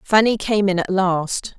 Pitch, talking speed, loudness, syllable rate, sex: 195 Hz, 190 wpm, -19 LUFS, 4.1 syllables/s, female